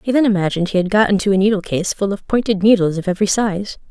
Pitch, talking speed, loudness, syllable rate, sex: 200 Hz, 260 wpm, -17 LUFS, 7.0 syllables/s, female